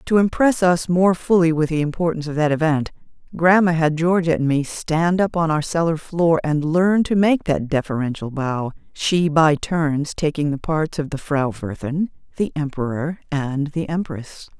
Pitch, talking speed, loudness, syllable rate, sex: 160 Hz, 180 wpm, -20 LUFS, 4.6 syllables/s, female